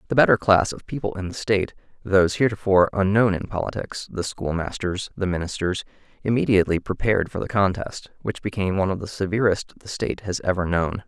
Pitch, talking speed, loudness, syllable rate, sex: 100 Hz, 180 wpm, -23 LUFS, 6.2 syllables/s, male